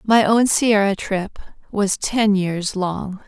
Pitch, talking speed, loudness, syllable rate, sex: 200 Hz, 145 wpm, -19 LUFS, 3.0 syllables/s, female